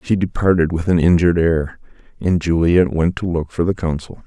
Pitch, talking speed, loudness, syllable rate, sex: 85 Hz, 195 wpm, -17 LUFS, 5.3 syllables/s, male